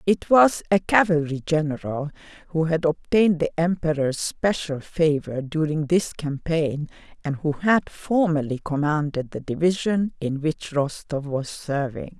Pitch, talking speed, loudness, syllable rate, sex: 160 Hz, 135 wpm, -23 LUFS, 4.3 syllables/s, female